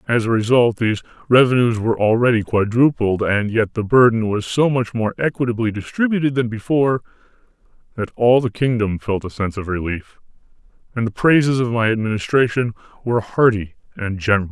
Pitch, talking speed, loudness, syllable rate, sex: 115 Hz, 160 wpm, -18 LUFS, 5.8 syllables/s, male